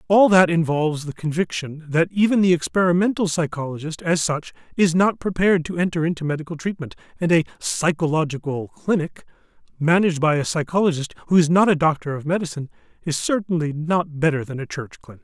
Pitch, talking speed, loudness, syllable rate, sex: 165 Hz, 170 wpm, -21 LUFS, 6.0 syllables/s, male